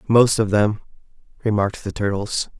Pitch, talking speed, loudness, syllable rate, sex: 105 Hz, 140 wpm, -20 LUFS, 5.1 syllables/s, male